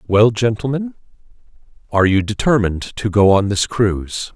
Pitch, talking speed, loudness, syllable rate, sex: 110 Hz, 140 wpm, -17 LUFS, 5.1 syllables/s, male